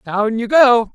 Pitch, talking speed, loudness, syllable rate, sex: 235 Hz, 190 wpm, -14 LUFS, 3.8 syllables/s, female